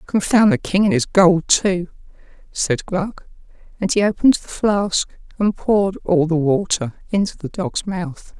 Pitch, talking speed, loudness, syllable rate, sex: 195 Hz, 165 wpm, -18 LUFS, 4.3 syllables/s, female